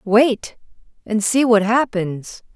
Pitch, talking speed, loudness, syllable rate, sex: 220 Hz, 115 wpm, -18 LUFS, 3.2 syllables/s, female